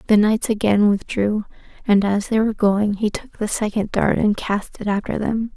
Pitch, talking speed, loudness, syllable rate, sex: 210 Hz, 205 wpm, -20 LUFS, 5.0 syllables/s, female